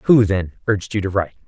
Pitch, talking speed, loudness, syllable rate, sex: 100 Hz, 245 wpm, -19 LUFS, 6.8 syllables/s, male